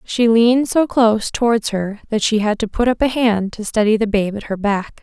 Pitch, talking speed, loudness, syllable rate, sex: 220 Hz, 250 wpm, -17 LUFS, 5.2 syllables/s, female